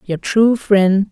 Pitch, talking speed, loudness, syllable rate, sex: 205 Hz, 160 wpm, -14 LUFS, 3.0 syllables/s, female